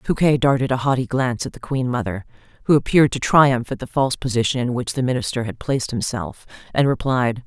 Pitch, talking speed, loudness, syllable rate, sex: 125 Hz, 210 wpm, -20 LUFS, 6.1 syllables/s, female